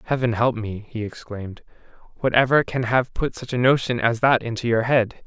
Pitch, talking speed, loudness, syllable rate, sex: 120 Hz, 205 wpm, -21 LUFS, 5.2 syllables/s, male